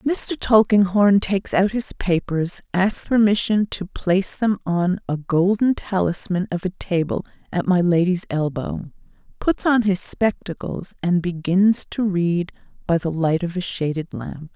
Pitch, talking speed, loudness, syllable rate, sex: 185 Hz, 155 wpm, -21 LUFS, 4.2 syllables/s, female